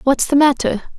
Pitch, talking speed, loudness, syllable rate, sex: 270 Hz, 185 wpm, -15 LUFS, 4.8 syllables/s, female